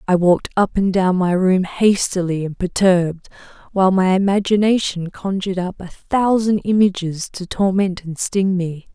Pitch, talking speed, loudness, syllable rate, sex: 185 Hz, 155 wpm, -18 LUFS, 4.8 syllables/s, female